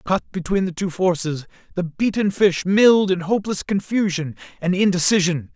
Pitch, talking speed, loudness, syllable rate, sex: 185 Hz, 150 wpm, -20 LUFS, 5.1 syllables/s, male